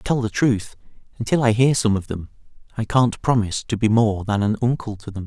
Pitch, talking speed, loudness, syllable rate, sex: 110 Hz, 240 wpm, -20 LUFS, 5.8 syllables/s, male